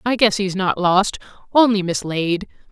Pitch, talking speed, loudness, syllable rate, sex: 195 Hz, 135 wpm, -18 LUFS, 4.4 syllables/s, female